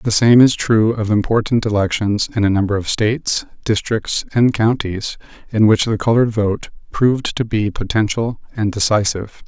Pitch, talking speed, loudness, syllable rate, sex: 110 Hz, 165 wpm, -17 LUFS, 5.0 syllables/s, male